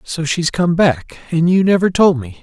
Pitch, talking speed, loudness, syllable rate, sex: 170 Hz, 225 wpm, -15 LUFS, 4.5 syllables/s, male